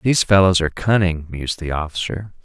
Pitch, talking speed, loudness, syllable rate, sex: 90 Hz, 170 wpm, -18 LUFS, 6.1 syllables/s, male